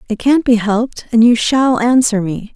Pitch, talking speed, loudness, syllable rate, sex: 235 Hz, 210 wpm, -13 LUFS, 4.8 syllables/s, female